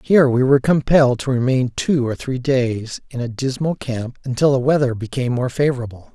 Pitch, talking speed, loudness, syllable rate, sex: 130 Hz, 195 wpm, -19 LUFS, 5.6 syllables/s, male